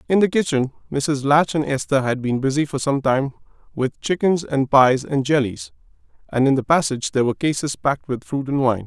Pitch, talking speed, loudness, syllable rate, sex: 140 Hz, 210 wpm, -20 LUFS, 5.6 syllables/s, male